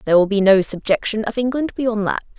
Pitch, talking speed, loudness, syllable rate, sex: 215 Hz, 225 wpm, -18 LUFS, 6.1 syllables/s, female